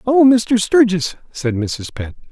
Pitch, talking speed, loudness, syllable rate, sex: 195 Hz, 155 wpm, -16 LUFS, 3.7 syllables/s, male